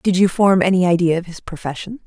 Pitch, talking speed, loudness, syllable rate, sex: 180 Hz, 230 wpm, -17 LUFS, 6.0 syllables/s, female